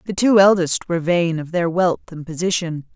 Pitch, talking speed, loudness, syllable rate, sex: 175 Hz, 205 wpm, -18 LUFS, 5.3 syllables/s, female